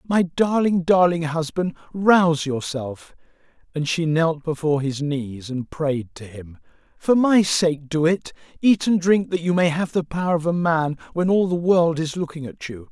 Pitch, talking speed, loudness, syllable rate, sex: 160 Hz, 190 wpm, -21 LUFS, 4.5 syllables/s, male